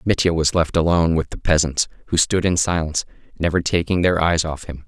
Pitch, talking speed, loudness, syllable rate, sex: 85 Hz, 210 wpm, -19 LUFS, 6.0 syllables/s, male